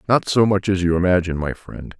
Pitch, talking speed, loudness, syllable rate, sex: 95 Hz, 240 wpm, -19 LUFS, 6.1 syllables/s, male